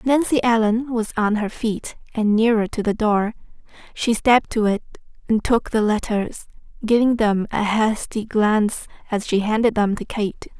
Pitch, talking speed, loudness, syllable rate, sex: 220 Hz, 170 wpm, -20 LUFS, 4.6 syllables/s, female